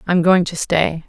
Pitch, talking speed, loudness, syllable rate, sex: 170 Hz, 220 wpm, -16 LUFS, 4.4 syllables/s, female